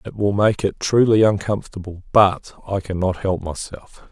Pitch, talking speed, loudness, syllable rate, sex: 100 Hz, 160 wpm, -19 LUFS, 4.8 syllables/s, male